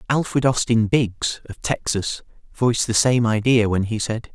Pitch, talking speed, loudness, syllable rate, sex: 115 Hz, 165 wpm, -20 LUFS, 4.4 syllables/s, male